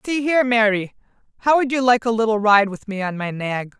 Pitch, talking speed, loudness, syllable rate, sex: 225 Hz, 235 wpm, -19 LUFS, 5.7 syllables/s, female